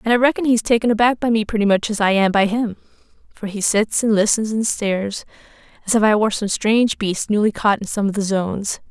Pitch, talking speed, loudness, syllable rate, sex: 215 Hz, 245 wpm, -18 LUFS, 6.1 syllables/s, female